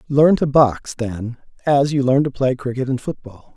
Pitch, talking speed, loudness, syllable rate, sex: 130 Hz, 200 wpm, -18 LUFS, 4.6 syllables/s, male